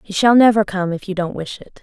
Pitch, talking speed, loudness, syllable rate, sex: 195 Hz, 295 wpm, -16 LUFS, 5.8 syllables/s, female